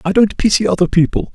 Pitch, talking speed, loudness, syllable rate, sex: 190 Hz, 225 wpm, -14 LUFS, 6.4 syllables/s, male